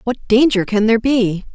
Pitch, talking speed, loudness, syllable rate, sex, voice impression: 225 Hz, 195 wpm, -15 LUFS, 5.5 syllables/s, female, feminine, adult-like, bright, clear, fluent, slightly intellectual, friendly, elegant, slightly lively, slightly sharp